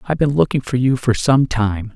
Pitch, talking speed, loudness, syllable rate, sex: 125 Hz, 245 wpm, -17 LUFS, 5.7 syllables/s, male